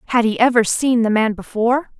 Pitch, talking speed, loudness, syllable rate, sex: 235 Hz, 210 wpm, -17 LUFS, 6.0 syllables/s, female